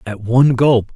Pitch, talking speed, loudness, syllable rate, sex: 120 Hz, 190 wpm, -14 LUFS, 5.0 syllables/s, male